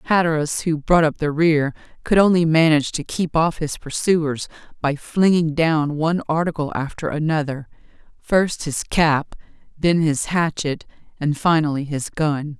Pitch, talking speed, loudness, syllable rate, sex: 155 Hz, 145 wpm, -20 LUFS, 4.5 syllables/s, female